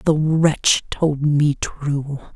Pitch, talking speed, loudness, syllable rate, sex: 150 Hz, 130 wpm, -19 LUFS, 2.5 syllables/s, female